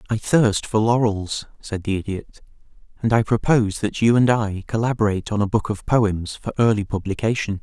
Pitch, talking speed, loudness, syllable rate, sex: 105 Hz, 180 wpm, -21 LUFS, 5.3 syllables/s, male